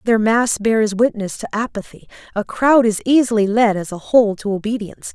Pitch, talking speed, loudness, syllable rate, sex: 220 Hz, 185 wpm, -17 LUFS, 5.3 syllables/s, female